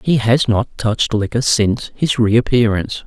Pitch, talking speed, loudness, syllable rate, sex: 115 Hz, 155 wpm, -16 LUFS, 4.8 syllables/s, male